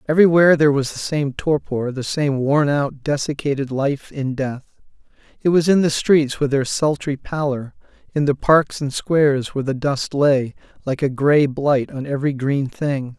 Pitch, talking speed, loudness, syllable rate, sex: 140 Hz, 175 wpm, -19 LUFS, 4.8 syllables/s, male